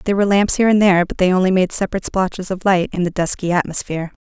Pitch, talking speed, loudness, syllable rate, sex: 185 Hz, 255 wpm, -17 LUFS, 7.8 syllables/s, female